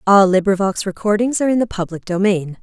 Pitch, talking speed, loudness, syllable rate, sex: 200 Hz, 185 wpm, -17 LUFS, 6.1 syllables/s, female